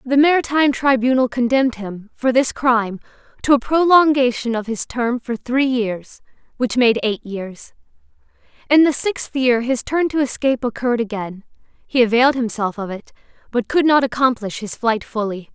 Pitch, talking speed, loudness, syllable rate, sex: 245 Hz, 165 wpm, -18 LUFS, 5.1 syllables/s, female